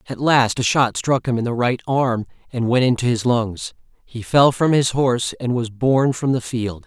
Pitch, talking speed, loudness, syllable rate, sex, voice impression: 125 Hz, 235 wpm, -19 LUFS, 4.8 syllables/s, male, masculine, middle-aged, tensed, powerful, clear, fluent, slightly intellectual, slightly mature, slightly friendly, wild, lively, slightly sharp